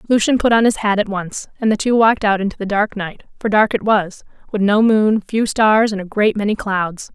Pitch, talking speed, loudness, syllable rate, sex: 210 Hz, 250 wpm, -16 LUFS, 5.3 syllables/s, female